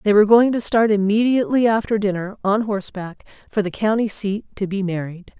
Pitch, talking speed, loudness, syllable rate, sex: 205 Hz, 190 wpm, -19 LUFS, 5.8 syllables/s, female